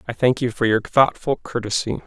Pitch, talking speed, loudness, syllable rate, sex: 120 Hz, 205 wpm, -20 LUFS, 5.7 syllables/s, male